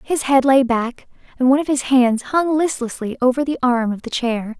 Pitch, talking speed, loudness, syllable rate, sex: 260 Hz, 220 wpm, -18 LUFS, 5.1 syllables/s, female